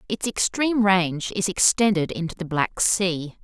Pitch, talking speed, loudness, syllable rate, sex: 190 Hz, 155 wpm, -22 LUFS, 4.7 syllables/s, female